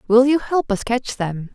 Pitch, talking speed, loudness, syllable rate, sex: 235 Hz, 235 wpm, -19 LUFS, 4.4 syllables/s, female